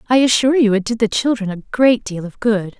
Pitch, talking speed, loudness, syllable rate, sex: 225 Hz, 255 wpm, -16 LUFS, 5.8 syllables/s, female